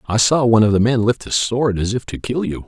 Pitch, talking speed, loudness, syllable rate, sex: 115 Hz, 315 wpm, -17 LUFS, 5.9 syllables/s, male